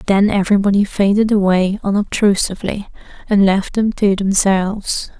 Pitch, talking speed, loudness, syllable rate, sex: 200 Hz, 115 wpm, -15 LUFS, 4.9 syllables/s, female